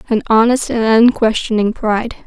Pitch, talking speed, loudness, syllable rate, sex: 225 Hz, 130 wpm, -14 LUFS, 5.1 syllables/s, female